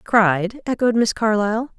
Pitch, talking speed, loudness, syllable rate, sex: 220 Hz, 135 wpm, -19 LUFS, 4.5 syllables/s, female